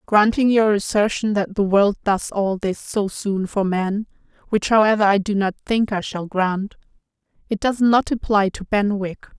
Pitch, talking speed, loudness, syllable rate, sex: 205 Hz, 180 wpm, -20 LUFS, 4.2 syllables/s, female